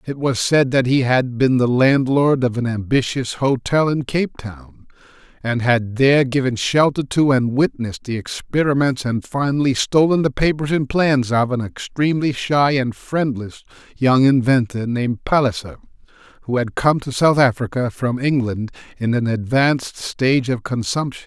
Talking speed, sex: 170 wpm, male